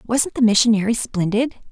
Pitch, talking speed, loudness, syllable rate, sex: 225 Hz, 140 wpm, -18 LUFS, 5.0 syllables/s, female